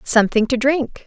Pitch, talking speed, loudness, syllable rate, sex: 250 Hz, 170 wpm, -18 LUFS, 5.2 syllables/s, female